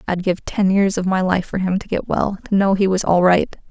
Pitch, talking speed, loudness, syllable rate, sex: 190 Hz, 290 wpm, -18 LUFS, 5.2 syllables/s, female